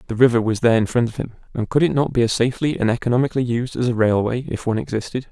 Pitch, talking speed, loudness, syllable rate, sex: 120 Hz, 270 wpm, -20 LUFS, 7.6 syllables/s, male